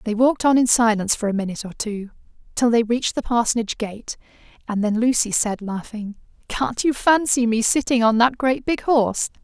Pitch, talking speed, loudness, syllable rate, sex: 230 Hz, 195 wpm, -20 LUFS, 5.6 syllables/s, female